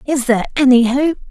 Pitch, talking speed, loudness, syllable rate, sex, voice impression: 260 Hz, 185 wpm, -14 LUFS, 6.1 syllables/s, female, very feminine, very adult-like, very thin, slightly tensed, weak, dark, soft, very muffled, fluent, very raspy, cute, intellectual, slightly refreshing, sincere, slightly calm, friendly, slightly reassuring, very unique, elegant, wild, slightly sweet, lively, strict, intense, slightly sharp, light